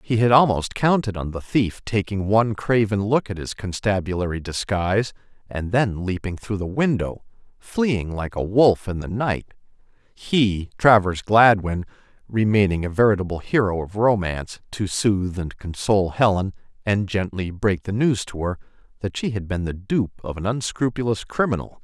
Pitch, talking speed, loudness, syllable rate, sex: 100 Hz, 155 wpm, -22 LUFS, 4.8 syllables/s, male